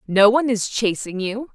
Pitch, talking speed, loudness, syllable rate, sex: 220 Hz, 195 wpm, -20 LUFS, 5.0 syllables/s, female